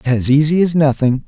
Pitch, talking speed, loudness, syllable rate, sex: 140 Hz, 190 wpm, -14 LUFS, 5.1 syllables/s, male